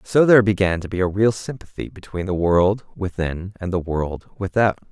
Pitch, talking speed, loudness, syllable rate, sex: 95 Hz, 210 wpm, -20 LUFS, 5.6 syllables/s, male